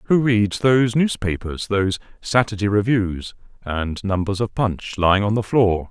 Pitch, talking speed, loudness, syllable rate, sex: 105 Hz, 150 wpm, -20 LUFS, 4.6 syllables/s, male